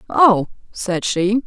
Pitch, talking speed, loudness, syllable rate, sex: 210 Hz, 125 wpm, -17 LUFS, 3.0 syllables/s, female